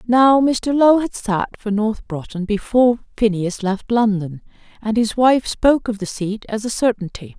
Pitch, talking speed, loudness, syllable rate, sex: 220 Hz, 180 wpm, -18 LUFS, 4.5 syllables/s, female